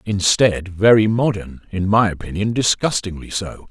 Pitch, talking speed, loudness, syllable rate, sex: 100 Hz, 130 wpm, -18 LUFS, 4.6 syllables/s, male